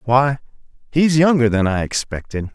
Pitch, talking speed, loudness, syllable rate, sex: 125 Hz, 140 wpm, -18 LUFS, 4.7 syllables/s, male